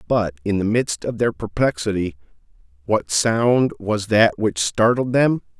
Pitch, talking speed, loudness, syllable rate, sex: 105 Hz, 150 wpm, -20 LUFS, 4.1 syllables/s, male